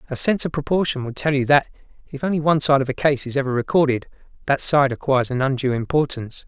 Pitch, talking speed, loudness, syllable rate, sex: 140 Hz, 225 wpm, -20 LUFS, 7.0 syllables/s, male